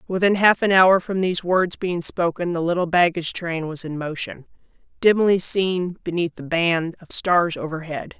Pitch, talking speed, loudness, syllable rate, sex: 175 Hz, 175 wpm, -20 LUFS, 4.8 syllables/s, female